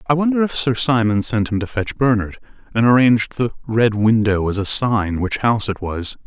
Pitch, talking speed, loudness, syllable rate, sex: 115 Hz, 210 wpm, -18 LUFS, 5.3 syllables/s, male